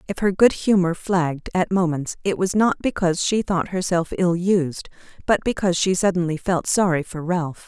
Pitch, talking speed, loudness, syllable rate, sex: 180 Hz, 190 wpm, -21 LUFS, 5.1 syllables/s, female